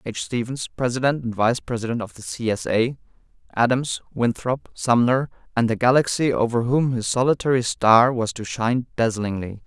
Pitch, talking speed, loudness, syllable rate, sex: 120 Hz, 160 wpm, -22 LUFS, 5.1 syllables/s, male